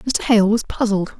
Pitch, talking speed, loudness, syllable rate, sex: 215 Hz, 200 wpm, -18 LUFS, 4.7 syllables/s, female